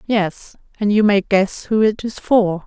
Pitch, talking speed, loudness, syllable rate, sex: 205 Hz, 205 wpm, -17 LUFS, 4.0 syllables/s, female